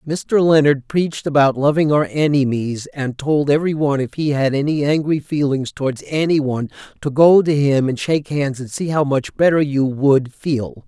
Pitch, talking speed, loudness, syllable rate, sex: 145 Hz, 190 wpm, -17 LUFS, 5.0 syllables/s, male